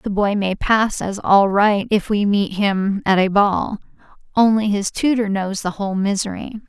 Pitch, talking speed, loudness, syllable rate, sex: 205 Hz, 190 wpm, -18 LUFS, 4.4 syllables/s, female